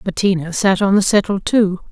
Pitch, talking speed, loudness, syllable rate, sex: 190 Hz, 190 wpm, -16 LUFS, 5.2 syllables/s, female